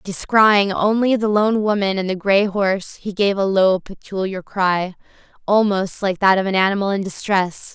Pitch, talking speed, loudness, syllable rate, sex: 195 Hz, 180 wpm, -18 LUFS, 4.7 syllables/s, female